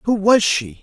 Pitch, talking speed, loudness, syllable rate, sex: 190 Hz, 220 wpm, -16 LUFS, 4.4 syllables/s, male